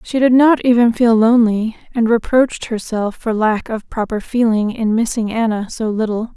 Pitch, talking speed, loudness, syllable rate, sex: 225 Hz, 180 wpm, -16 LUFS, 5.0 syllables/s, female